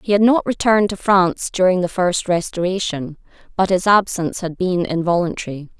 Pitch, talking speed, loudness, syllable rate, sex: 185 Hz, 165 wpm, -18 LUFS, 5.6 syllables/s, female